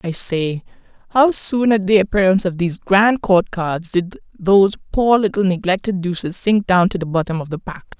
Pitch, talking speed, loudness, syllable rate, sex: 190 Hz, 195 wpm, -17 LUFS, 5.2 syllables/s, female